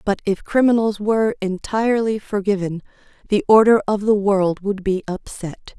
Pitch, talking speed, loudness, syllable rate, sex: 205 Hz, 145 wpm, -19 LUFS, 4.8 syllables/s, female